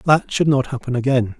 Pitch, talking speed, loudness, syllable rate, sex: 130 Hz, 215 wpm, -19 LUFS, 5.2 syllables/s, male